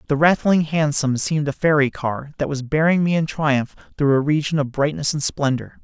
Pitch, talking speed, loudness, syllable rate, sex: 145 Hz, 205 wpm, -20 LUFS, 5.2 syllables/s, male